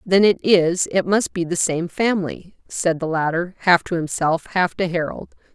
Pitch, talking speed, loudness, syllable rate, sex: 175 Hz, 195 wpm, -20 LUFS, 4.7 syllables/s, female